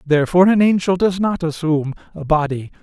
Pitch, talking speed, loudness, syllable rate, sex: 170 Hz, 170 wpm, -17 LUFS, 6.2 syllables/s, male